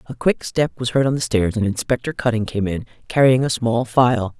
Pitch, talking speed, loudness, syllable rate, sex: 120 Hz, 230 wpm, -19 LUFS, 5.3 syllables/s, female